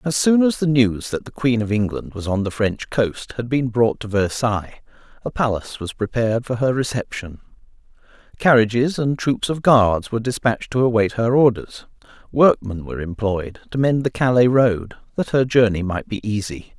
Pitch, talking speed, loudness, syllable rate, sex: 115 Hz, 185 wpm, -19 LUFS, 5.1 syllables/s, male